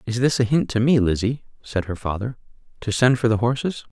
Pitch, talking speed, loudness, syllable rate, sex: 120 Hz, 225 wpm, -21 LUFS, 5.7 syllables/s, male